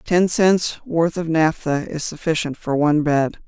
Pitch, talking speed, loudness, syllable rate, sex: 160 Hz, 175 wpm, -19 LUFS, 4.3 syllables/s, female